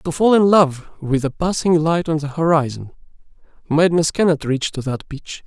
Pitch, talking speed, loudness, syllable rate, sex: 155 Hz, 185 wpm, -18 LUFS, 4.9 syllables/s, male